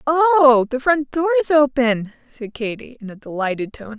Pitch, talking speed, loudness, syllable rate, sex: 265 Hz, 180 wpm, -17 LUFS, 4.5 syllables/s, female